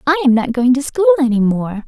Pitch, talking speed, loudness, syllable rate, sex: 270 Hz, 255 wpm, -14 LUFS, 5.9 syllables/s, female